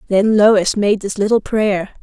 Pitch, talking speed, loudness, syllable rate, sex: 205 Hz, 180 wpm, -15 LUFS, 4.1 syllables/s, female